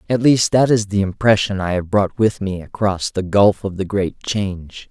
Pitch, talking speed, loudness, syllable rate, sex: 100 Hz, 220 wpm, -18 LUFS, 4.8 syllables/s, male